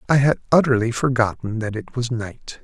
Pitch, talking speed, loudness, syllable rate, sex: 120 Hz, 180 wpm, -20 LUFS, 5.2 syllables/s, male